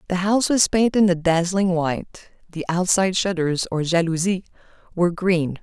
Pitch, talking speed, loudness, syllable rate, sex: 180 Hz, 150 wpm, -20 LUFS, 5.3 syllables/s, female